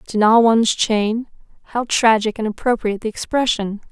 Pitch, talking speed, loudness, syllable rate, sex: 225 Hz, 140 wpm, -18 LUFS, 5.2 syllables/s, female